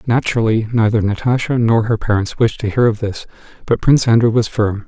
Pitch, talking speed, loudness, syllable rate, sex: 115 Hz, 195 wpm, -16 LUFS, 5.8 syllables/s, male